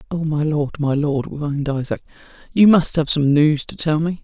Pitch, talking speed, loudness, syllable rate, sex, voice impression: 150 Hz, 215 wpm, -19 LUFS, 5.0 syllables/s, male, masculine, adult-like, clear, slightly halting, intellectual, calm, slightly friendly, slightly wild, kind